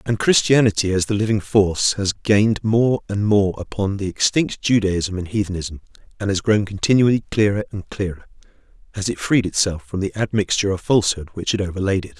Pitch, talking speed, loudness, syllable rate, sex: 100 Hz, 180 wpm, -19 LUFS, 5.7 syllables/s, male